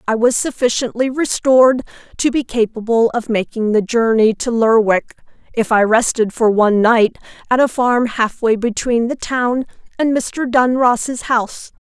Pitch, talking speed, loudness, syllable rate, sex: 235 Hz, 150 wpm, -16 LUFS, 4.5 syllables/s, female